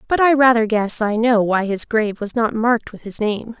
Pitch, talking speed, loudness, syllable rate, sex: 225 Hz, 250 wpm, -17 LUFS, 5.3 syllables/s, female